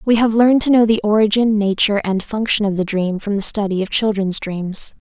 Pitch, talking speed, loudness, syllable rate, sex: 210 Hz, 225 wpm, -16 LUFS, 5.6 syllables/s, female